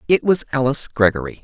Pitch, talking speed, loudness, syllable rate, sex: 130 Hz, 165 wpm, -17 LUFS, 6.8 syllables/s, male